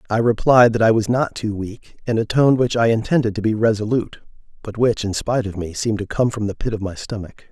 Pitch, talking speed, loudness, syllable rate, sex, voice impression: 110 Hz, 255 wpm, -19 LUFS, 6.0 syllables/s, male, very masculine, very adult-like, very middle-aged, slightly old, very thick, slightly relaxed, slightly powerful, slightly dark, slightly hard, slightly clear, fluent, slightly raspy, cool, very intellectual, sincere, calm, mature, very friendly, reassuring, slightly unique, wild, slightly sweet, slightly lively, very kind